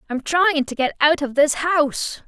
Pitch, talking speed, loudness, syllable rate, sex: 295 Hz, 210 wpm, -19 LUFS, 4.5 syllables/s, female